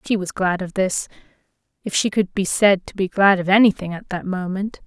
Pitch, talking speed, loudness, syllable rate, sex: 190 Hz, 220 wpm, -19 LUFS, 5.2 syllables/s, female